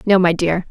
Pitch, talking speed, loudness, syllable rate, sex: 180 Hz, 255 wpm, -16 LUFS, 5.1 syllables/s, female